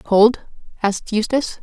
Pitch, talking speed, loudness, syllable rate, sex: 220 Hz, 110 wpm, -18 LUFS, 5.2 syllables/s, female